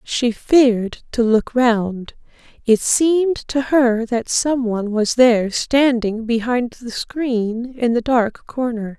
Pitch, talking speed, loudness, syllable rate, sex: 240 Hz, 140 wpm, -18 LUFS, 3.5 syllables/s, female